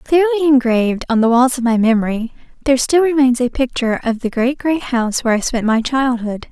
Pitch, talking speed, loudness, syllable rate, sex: 250 Hz, 210 wpm, -16 LUFS, 5.9 syllables/s, female